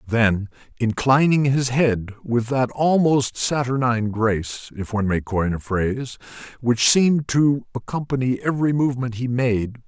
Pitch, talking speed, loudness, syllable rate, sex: 120 Hz, 140 wpm, -21 LUFS, 4.8 syllables/s, male